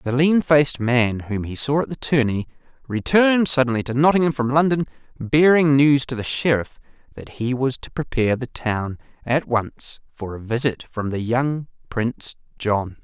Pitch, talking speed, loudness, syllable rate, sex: 130 Hz, 175 wpm, -20 LUFS, 4.8 syllables/s, male